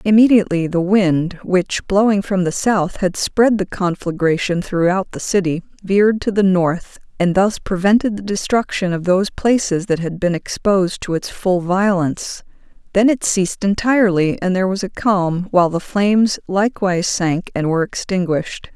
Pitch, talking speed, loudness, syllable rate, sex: 190 Hz, 165 wpm, -17 LUFS, 5.0 syllables/s, female